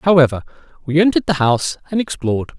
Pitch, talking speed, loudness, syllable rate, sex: 150 Hz, 165 wpm, -17 LUFS, 7.2 syllables/s, male